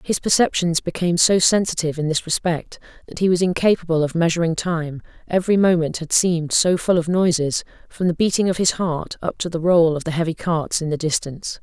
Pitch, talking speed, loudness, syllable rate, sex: 170 Hz, 205 wpm, -19 LUFS, 5.8 syllables/s, female